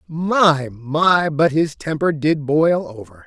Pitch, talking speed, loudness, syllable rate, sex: 150 Hz, 145 wpm, -17 LUFS, 3.3 syllables/s, male